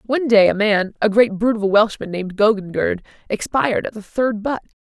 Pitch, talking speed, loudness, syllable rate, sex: 215 Hz, 210 wpm, -18 LUFS, 5.9 syllables/s, female